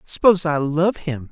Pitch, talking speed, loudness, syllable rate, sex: 160 Hz, 185 wpm, -19 LUFS, 4.1 syllables/s, male